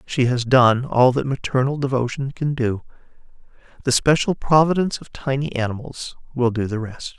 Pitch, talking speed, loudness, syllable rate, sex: 130 Hz, 160 wpm, -20 LUFS, 5.1 syllables/s, male